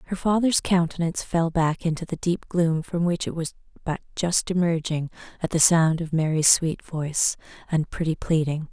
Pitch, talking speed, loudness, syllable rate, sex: 165 Hz, 180 wpm, -23 LUFS, 5.0 syllables/s, female